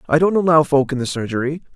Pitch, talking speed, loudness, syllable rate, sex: 145 Hz, 240 wpm, -17 LUFS, 6.9 syllables/s, male